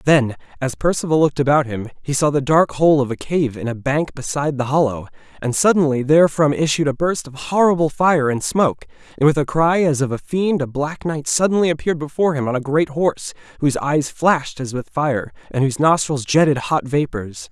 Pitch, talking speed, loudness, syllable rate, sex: 145 Hz, 210 wpm, -18 LUFS, 5.7 syllables/s, male